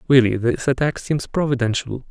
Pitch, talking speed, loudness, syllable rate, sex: 125 Hz, 140 wpm, -20 LUFS, 5.2 syllables/s, male